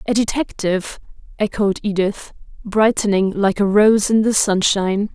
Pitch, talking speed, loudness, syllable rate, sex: 205 Hz, 130 wpm, -17 LUFS, 4.7 syllables/s, female